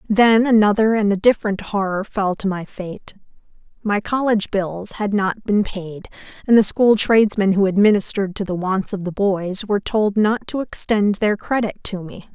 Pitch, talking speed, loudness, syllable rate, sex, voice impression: 205 Hz, 185 wpm, -18 LUFS, 4.9 syllables/s, female, feminine, adult-like, tensed, bright, soft, clear, slightly raspy, intellectual, friendly, reassuring, lively, kind